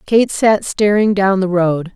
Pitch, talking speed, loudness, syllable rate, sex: 195 Hz, 185 wpm, -14 LUFS, 3.8 syllables/s, female